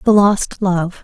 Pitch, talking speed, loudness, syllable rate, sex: 190 Hz, 175 wpm, -15 LUFS, 3.3 syllables/s, female